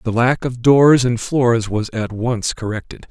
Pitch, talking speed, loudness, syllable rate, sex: 120 Hz, 195 wpm, -17 LUFS, 4.0 syllables/s, male